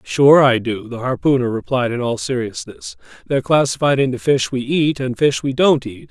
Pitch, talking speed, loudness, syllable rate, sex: 130 Hz, 195 wpm, -17 LUFS, 5.1 syllables/s, male